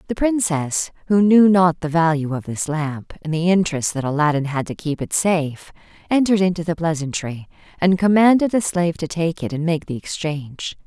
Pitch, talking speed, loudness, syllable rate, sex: 165 Hz, 195 wpm, -19 LUFS, 5.3 syllables/s, female